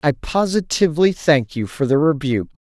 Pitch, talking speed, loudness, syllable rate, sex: 145 Hz, 160 wpm, -18 LUFS, 5.4 syllables/s, male